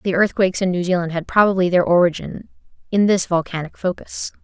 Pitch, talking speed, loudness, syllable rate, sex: 185 Hz, 175 wpm, -18 LUFS, 5.9 syllables/s, female